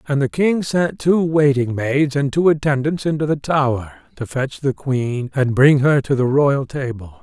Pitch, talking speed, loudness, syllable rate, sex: 140 Hz, 200 wpm, -18 LUFS, 4.4 syllables/s, male